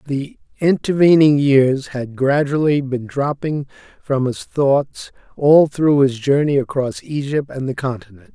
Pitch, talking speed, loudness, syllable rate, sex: 140 Hz, 135 wpm, -17 LUFS, 4.1 syllables/s, male